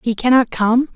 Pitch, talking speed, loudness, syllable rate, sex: 240 Hz, 190 wpm, -15 LUFS, 4.9 syllables/s, female